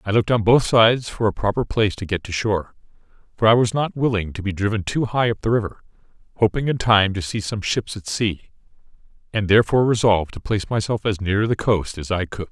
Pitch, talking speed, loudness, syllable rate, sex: 105 Hz, 230 wpm, -20 LUFS, 6.2 syllables/s, male